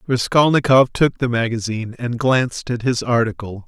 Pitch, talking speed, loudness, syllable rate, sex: 120 Hz, 145 wpm, -18 LUFS, 5.1 syllables/s, male